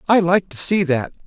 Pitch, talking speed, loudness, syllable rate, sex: 170 Hz, 240 wpm, -18 LUFS, 5.2 syllables/s, male